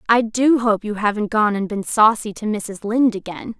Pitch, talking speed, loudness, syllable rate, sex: 215 Hz, 215 wpm, -19 LUFS, 5.0 syllables/s, female